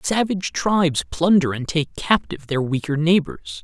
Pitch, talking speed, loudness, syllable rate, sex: 155 Hz, 150 wpm, -20 LUFS, 4.9 syllables/s, male